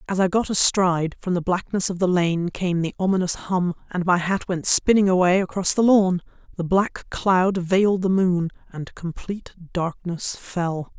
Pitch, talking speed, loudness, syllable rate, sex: 180 Hz, 175 wpm, -21 LUFS, 4.5 syllables/s, female